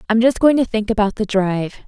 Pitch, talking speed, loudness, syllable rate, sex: 220 Hz, 255 wpm, -17 LUFS, 6.3 syllables/s, female